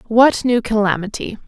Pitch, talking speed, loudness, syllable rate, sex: 225 Hz, 120 wpm, -16 LUFS, 4.9 syllables/s, female